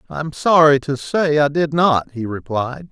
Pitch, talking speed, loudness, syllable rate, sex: 145 Hz, 205 wpm, -17 LUFS, 4.4 syllables/s, male